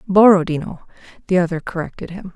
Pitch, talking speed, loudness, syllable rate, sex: 180 Hz, 125 wpm, -17 LUFS, 6.2 syllables/s, female